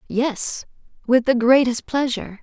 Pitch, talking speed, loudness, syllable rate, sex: 245 Hz, 125 wpm, -19 LUFS, 4.4 syllables/s, female